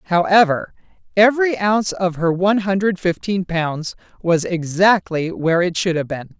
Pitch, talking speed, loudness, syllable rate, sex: 180 Hz, 150 wpm, -18 LUFS, 4.8 syllables/s, female